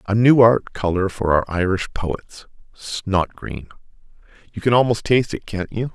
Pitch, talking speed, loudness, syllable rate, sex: 100 Hz, 160 wpm, -19 LUFS, 4.5 syllables/s, male